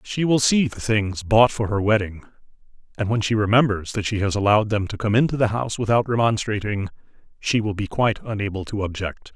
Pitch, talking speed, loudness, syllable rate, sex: 105 Hz, 205 wpm, -21 LUFS, 5.9 syllables/s, male